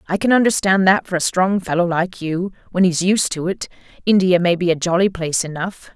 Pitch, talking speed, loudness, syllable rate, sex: 180 Hz, 220 wpm, -18 LUFS, 5.5 syllables/s, female